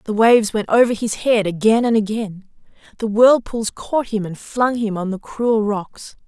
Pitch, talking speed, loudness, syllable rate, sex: 215 Hz, 190 wpm, -18 LUFS, 4.5 syllables/s, female